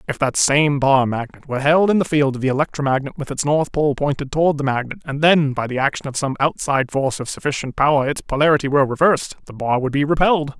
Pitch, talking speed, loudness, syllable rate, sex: 140 Hz, 240 wpm, -18 LUFS, 6.5 syllables/s, male